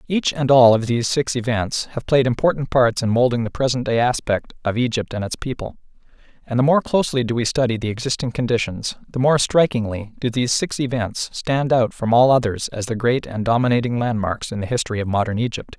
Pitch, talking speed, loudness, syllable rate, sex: 120 Hz, 215 wpm, -20 LUFS, 5.8 syllables/s, male